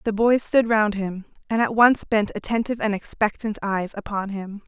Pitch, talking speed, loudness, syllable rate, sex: 210 Hz, 195 wpm, -22 LUFS, 5.0 syllables/s, female